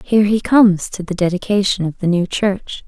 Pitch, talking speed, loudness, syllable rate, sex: 195 Hz, 210 wpm, -16 LUFS, 5.4 syllables/s, female